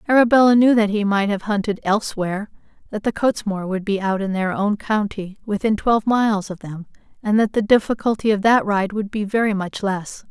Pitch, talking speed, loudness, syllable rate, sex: 205 Hz, 200 wpm, -19 LUFS, 5.7 syllables/s, female